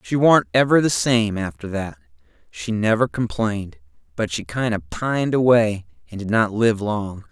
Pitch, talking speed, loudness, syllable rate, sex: 105 Hz, 165 wpm, -20 LUFS, 4.6 syllables/s, male